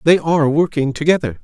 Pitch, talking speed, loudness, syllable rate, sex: 155 Hz, 170 wpm, -16 LUFS, 6.2 syllables/s, male